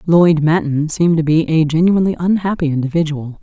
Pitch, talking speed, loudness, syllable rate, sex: 160 Hz, 160 wpm, -15 LUFS, 5.8 syllables/s, female